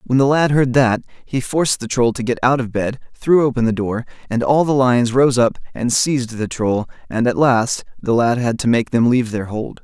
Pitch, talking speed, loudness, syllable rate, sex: 125 Hz, 245 wpm, -17 LUFS, 5.1 syllables/s, male